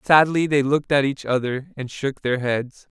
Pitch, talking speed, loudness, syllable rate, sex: 135 Hz, 200 wpm, -21 LUFS, 4.7 syllables/s, male